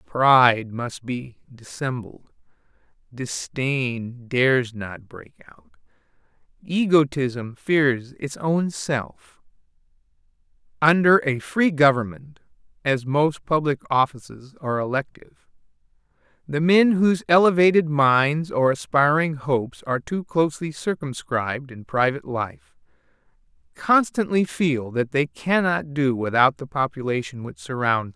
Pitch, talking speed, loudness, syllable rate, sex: 140 Hz, 110 wpm, -21 LUFS, 4.1 syllables/s, male